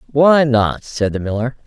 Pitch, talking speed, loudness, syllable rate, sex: 125 Hz, 180 wpm, -16 LUFS, 4.3 syllables/s, male